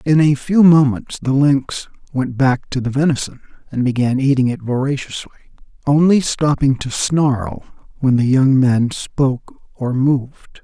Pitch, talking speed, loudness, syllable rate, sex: 135 Hz, 150 wpm, -16 LUFS, 4.4 syllables/s, male